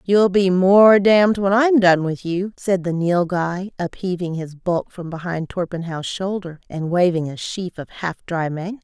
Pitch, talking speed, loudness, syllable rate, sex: 180 Hz, 185 wpm, -19 LUFS, 4.4 syllables/s, female